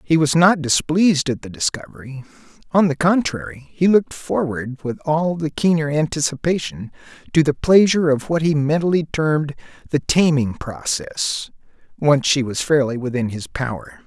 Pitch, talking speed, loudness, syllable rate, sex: 150 Hz, 155 wpm, -19 LUFS, 5.0 syllables/s, male